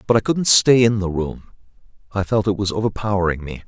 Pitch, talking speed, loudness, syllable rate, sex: 100 Hz, 215 wpm, -18 LUFS, 6.0 syllables/s, male